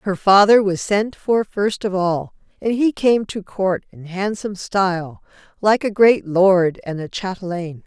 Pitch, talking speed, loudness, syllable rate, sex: 195 Hz, 175 wpm, -18 LUFS, 4.1 syllables/s, female